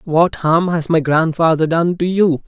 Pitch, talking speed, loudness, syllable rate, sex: 165 Hz, 195 wpm, -15 LUFS, 4.3 syllables/s, male